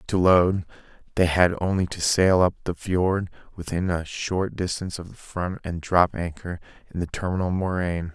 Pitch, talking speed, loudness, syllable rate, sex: 90 Hz, 175 wpm, -24 LUFS, 4.9 syllables/s, male